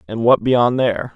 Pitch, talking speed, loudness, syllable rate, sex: 120 Hz, 210 wpm, -16 LUFS, 5.1 syllables/s, male